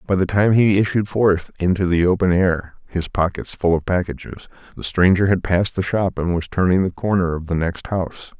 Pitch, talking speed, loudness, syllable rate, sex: 90 Hz, 215 wpm, -19 LUFS, 5.3 syllables/s, male